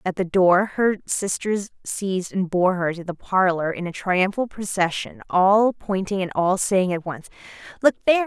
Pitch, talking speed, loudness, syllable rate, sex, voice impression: 190 Hz, 180 wpm, -22 LUFS, 4.6 syllables/s, female, feminine, slightly adult-like, cute, slightly refreshing, friendly, slightly lively